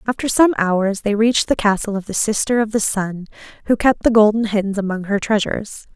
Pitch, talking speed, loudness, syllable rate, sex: 210 Hz, 210 wpm, -17 LUFS, 5.5 syllables/s, female